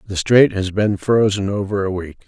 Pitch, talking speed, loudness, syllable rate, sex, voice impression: 100 Hz, 210 wpm, -17 LUFS, 5.0 syllables/s, male, masculine, slightly old, slightly tensed, powerful, slightly hard, muffled, slightly raspy, calm, mature, friendly, reassuring, wild, slightly lively, kind